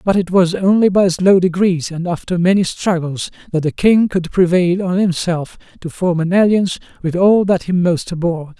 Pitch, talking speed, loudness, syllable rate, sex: 180 Hz, 195 wpm, -15 LUFS, 5.0 syllables/s, male